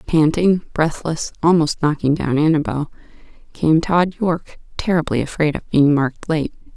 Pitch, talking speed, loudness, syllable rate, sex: 155 Hz, 135 wpm, -18 LUFS, 4.8 syllables/s, female